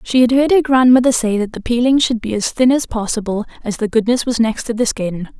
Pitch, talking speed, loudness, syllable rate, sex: 235 Hz, 255 wpm, -15 LUFS, 5.7 syllables/s, female